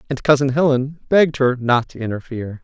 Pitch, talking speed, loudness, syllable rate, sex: 130 Hz, 180 wpm, -18 LUFS, 6.0 syllables/s, male